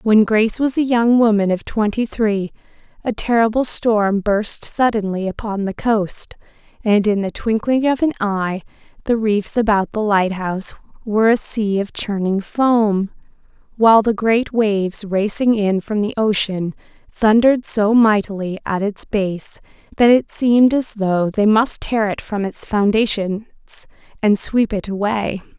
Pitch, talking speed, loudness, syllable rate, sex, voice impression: 210 Hz, 155 wpm, -17 LUFS, 4.3 syllables/s, female, very feminine, young, very thin, tensed, slightly weak, bright, soft, clear, slightly fluent, cute, intellectual, refreshing, sincere, very calm, friendly, reassuring, unique, elegant, slightly wild, very sweet, slightly lively, very kind, modest